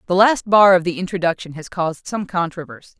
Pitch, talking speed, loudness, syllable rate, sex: 180 Hz, 200 wpm, -18 LUFS, 6.2 syllables/s, female